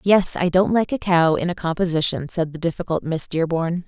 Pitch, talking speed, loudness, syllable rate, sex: 170 Hz, 215 wpm, -21 LUFS, 5.4 syllables/s, female